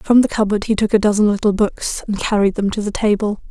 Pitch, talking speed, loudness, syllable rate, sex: 210 Hz, 255 wpm, -17 LUFS, 6.0 syllables/s, female